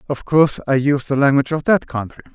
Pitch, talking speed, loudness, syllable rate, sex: 140 Hz, 230 wpm, -17 LUFS, 7.0 syllables/s, male